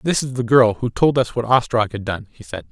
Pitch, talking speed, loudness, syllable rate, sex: 120 Hz, 285 wpm, -18 LUFS, 5.5 syllables/s, male